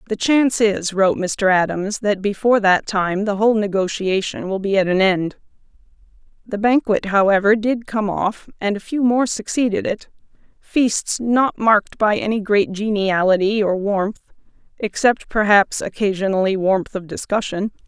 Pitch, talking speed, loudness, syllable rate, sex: 205 Hz, 150 wpm, -18 LUFS, 4.7 syllables/s, female